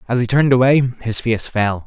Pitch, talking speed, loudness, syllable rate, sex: 120 Hz, 225 wpm, -16 LUFS, 5.3 syllables/s, male